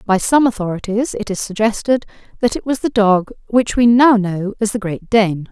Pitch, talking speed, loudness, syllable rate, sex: 215 Hz, 205 wpm, -16 LUFS, 5.0 syllables/s, female